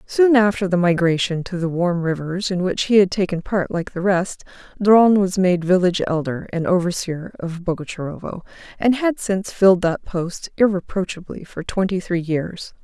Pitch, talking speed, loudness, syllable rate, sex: 185 Hz, 175 wpm, -19 LUFS, 4.9 syllables/s, female